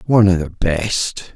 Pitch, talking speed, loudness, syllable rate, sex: 95 Hz, 175 wpm, -17 LUFS, 4.2 syllables/s, male